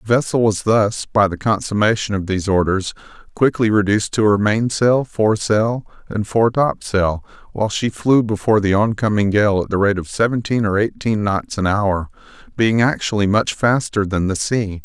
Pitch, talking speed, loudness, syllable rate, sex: 105 Hz, 175 wpm, -18 LUFS, 5.2 syllables/s, male